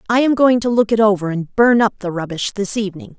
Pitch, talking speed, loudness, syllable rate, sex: 210 Hz, 265 wpm, -16 LUFS, 6.1 syllables/s, female